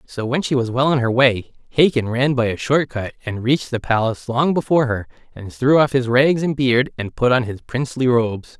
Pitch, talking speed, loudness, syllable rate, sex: 125 Hz, 235 wpm, -18 LUFS, 5.4 syllables/s, male